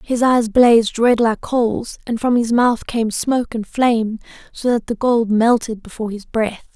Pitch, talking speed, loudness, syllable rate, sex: 230 Hz, 195 wpm, -17 LUFS, 4.6 syllables/s, female